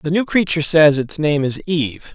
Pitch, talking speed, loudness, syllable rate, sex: 155 Hz, 225 wpm, -17 LUFS, 5.4 syllables/s, male